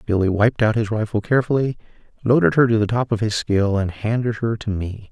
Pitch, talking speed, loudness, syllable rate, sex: 110 Hz, 225 wpm, -20 LUFS, 5.8 syllables/s, male